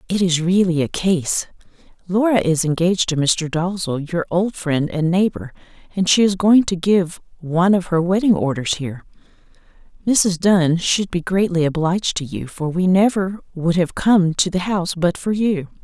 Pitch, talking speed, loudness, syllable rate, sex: 175 Hz, 180 wpm, -18 LUFS, 4.8 syllables/s, female